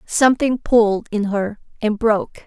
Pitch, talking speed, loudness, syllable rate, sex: 220 Hz, 120 wpm, -18 LUFS, 4.8 syllables/s, female